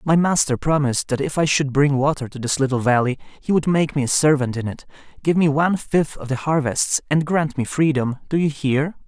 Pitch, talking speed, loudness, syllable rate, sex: 145 Hz, 225 wpm, -20 LUFS, 5.5 syllables/s, male